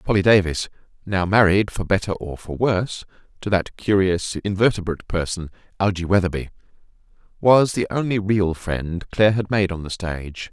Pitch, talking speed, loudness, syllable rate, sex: 95 Hz, 155 wpm, -21 LUFS, 5.2 syllables/s, male